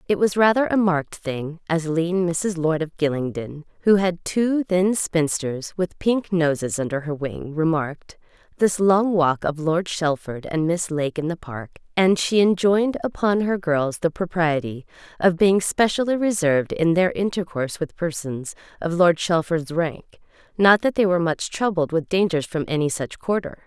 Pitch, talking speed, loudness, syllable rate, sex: 170 Hz, 170 wpm, -21 LUFS, 4.6 syllables/s, female